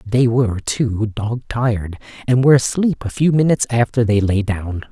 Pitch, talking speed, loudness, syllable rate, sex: 115 Hz, 185 wpm, -17 LUFS, 5.1 syllables/s, male